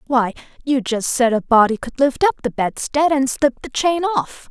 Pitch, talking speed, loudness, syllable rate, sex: 260 Hz, 215 wpm, -18 LUFS, 4.7 syllables/s, female